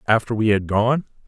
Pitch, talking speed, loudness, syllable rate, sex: 110 Hz, 190 wpm, -20 LUFS, 5.4 syllables/s, male